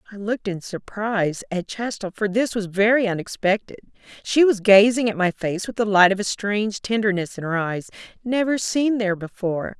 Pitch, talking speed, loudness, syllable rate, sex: 205 Hz, 190 wpm, -21 LUFS, 5.4 syllables/s, female